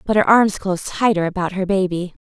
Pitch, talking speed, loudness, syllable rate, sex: 190 Hz, 215 wpm, -18 LUFS, 5.9 syllables/s, female